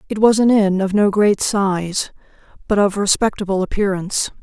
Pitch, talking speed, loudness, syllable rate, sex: 200 Hz, 165 wpm, -17 LUFS, 5.0 syllables/s, female